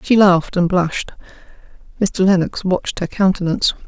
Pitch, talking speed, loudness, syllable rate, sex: 185 Hz, 140 wpm, -17 LUFS, 5.7 syllables/s, female